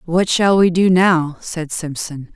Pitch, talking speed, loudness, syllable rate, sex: 170 Hz, 180 wpm, -16 LUFS, 3.7 syllables/s, female